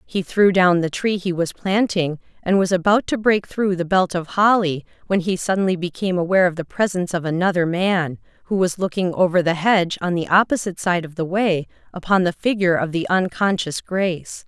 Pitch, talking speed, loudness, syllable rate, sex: 180 Hz, 205 wpm, -20 LUFS, 5.6 syllables/s, female